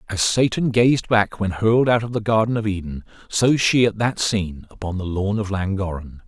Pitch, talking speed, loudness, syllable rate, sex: 105 Hz, 210 wpm, -20 LUFS, 5.2 syllables/s, male